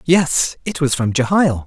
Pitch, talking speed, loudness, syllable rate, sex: 145 Hz, 180 wpm, -17 LUFS, 4.1 syllables/s, male